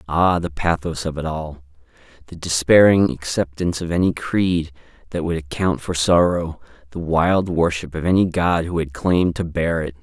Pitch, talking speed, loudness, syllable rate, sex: 85 Hz, 175 wpm, -19 LUFS, 4.9 syllables/s, male